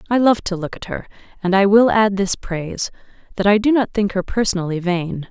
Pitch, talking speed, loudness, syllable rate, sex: 200 Hz, 225 wpm, -18 LUFS, 5.6 syllables/s, female